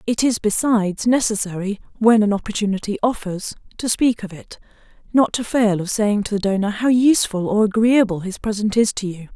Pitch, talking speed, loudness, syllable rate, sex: 215 Hz, 185 wpm, -19 LUFS, 5.5 syllables/s, female